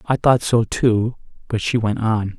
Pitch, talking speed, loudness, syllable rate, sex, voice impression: 115 Hz, 200 wpm, -19 LUFS, 4.1 syllables/s, male, masculine, adult-like, tensed, powerful, slightly bright, slightly soft, clear, slightly raspy, cool, intellectual, calm, friendly, slightly wild, lively